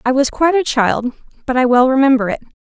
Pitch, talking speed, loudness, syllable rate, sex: 260 Hz, 230 wpm, -15 LUFS, 6.5 syllables/s, female